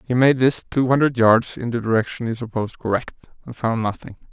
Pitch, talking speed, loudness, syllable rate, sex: 120 Hz, 210 wpm, -20 LUFS, 5.9 syllables/s, male